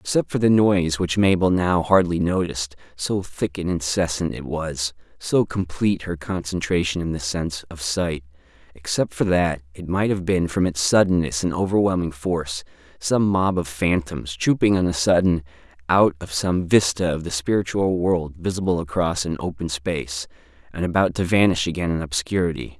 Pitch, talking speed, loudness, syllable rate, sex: 85 Hz, 170 wpm, -22 LUFS, 5.1 syllables/s, male